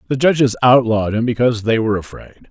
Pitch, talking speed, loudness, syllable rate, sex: 120 Hz, 190 wpm, -15 LUFS, 7.1 syllables/s, male